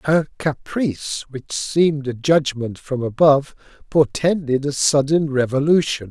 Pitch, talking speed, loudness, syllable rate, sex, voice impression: 145 Hz, 120 wpm, -19 LUFS, 4.4 syllables/s, male, very masculine, old, thick, relaxed, slightly weak, bright, slightly soft, muffled, fluent, slightly raspy, cool, slightly intellectual, refreshing, sincere, very calm, mature, friendly, slightly reassuring, unique, slightly elegant, wild, slightly sweet, lively, kind, modest